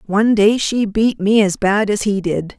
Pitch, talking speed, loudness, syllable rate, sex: 210 Hz, 230 wpm, -16 LUFS, 4.5 syllables/s, female